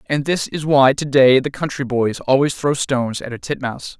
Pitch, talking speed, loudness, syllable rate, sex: 135 Hz, 225 wpm, -18 LUFS, 5.1 syllables/s, male